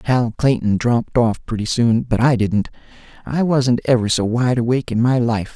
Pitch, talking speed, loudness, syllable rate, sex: 120 Hz, 195 wpm, -18 LUFS, 5.0 syllables/s, male